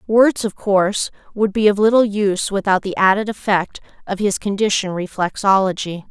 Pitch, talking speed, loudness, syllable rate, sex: 200 Hz, 155 wpm, -17 LUFS, 5.3 syllables/s, female